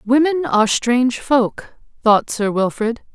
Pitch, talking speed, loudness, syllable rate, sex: 240 Hz, 135 wpm, -17 LUFS, 4.3 syllables/s, female